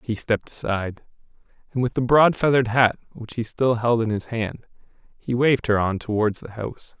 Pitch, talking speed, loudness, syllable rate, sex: 115 Hz, 195 wpm, -22 LUFS, 5.6 syllables/s, male